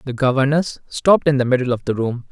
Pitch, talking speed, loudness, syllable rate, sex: 135 Hz, 235 wpm, -18 LUFS, 6.2 syllables/s, male